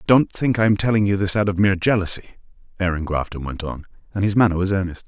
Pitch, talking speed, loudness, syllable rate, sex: 95 Hz, 235 wpm, -20 LUFS, 6.9 syllables/s, male